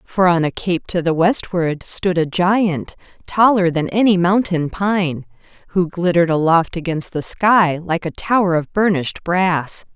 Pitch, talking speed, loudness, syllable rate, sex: 175 Hz, 165 wpm, -17 LUFS, 4.2 syllables/s, female